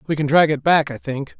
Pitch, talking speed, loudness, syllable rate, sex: 150 Hz, 300 wpm, -18 LUFS, 5.7 syllables/s, male